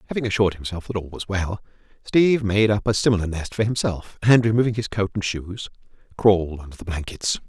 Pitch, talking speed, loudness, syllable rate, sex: 100 Hz, 200 wpm, -22 LUFS, 6.0 syllables/s, male